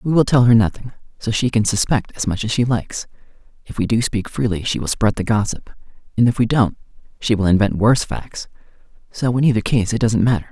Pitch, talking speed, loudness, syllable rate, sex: 110 Hz, 230 wpm, -18 LUFS, 6.0 syllables/s, male